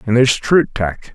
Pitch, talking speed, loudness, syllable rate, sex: 120 Hz, 210 wpm, -16 LUFS, 5.3 syllables/s, male